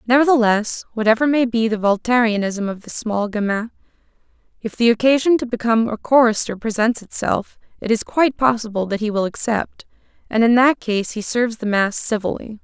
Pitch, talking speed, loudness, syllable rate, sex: 225 Hz, 170 wpm, -18 LUFS, 5.5 syllables/s, female